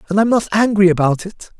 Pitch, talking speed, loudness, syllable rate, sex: 195 Hz, 225 wpm, -15 LUFS, 6.3 syllables/s, male